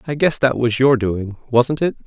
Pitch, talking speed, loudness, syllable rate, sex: 125 Hz, 205 wpm, -18 LUFS, 4.6 syllables/s, male